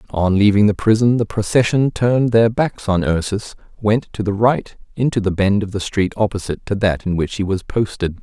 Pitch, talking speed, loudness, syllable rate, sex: 105 Hz, 210 wpm, -18 LUFS, 5.3 syllables/s, male